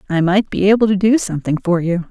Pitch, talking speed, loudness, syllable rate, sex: 190 Hz, 255 wpm, -16 LUFS, 6.3 syllables/s, female